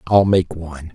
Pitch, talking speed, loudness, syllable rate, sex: 85 Hz, 190 wpm, -17 LUFS, 4.8 syllables/s, male